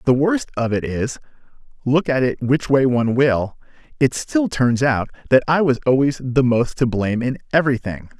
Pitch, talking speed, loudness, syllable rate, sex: 130 Hz, 190 wpm, -19 LUFS, 5.0 syllables/s, male